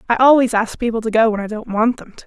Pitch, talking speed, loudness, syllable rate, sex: 230 Hz, 320 wpm, -16 LUFS, 6.8 syllables/s, female